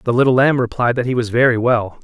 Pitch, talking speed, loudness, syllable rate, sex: 120 Hz, 265 wpm, -16 LUFS, 6.3 syllables/s, male